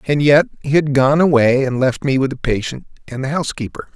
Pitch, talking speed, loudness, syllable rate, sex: 140 Hz, 230 wpm, -16 LUFS, 5.8 syllables/s, male